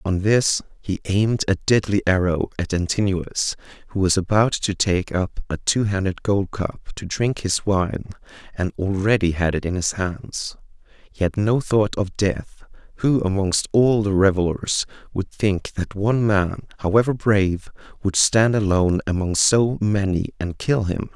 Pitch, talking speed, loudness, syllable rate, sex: 100 Hz, 160 wpm, -21 LUFS, 4.4 syllables/s, male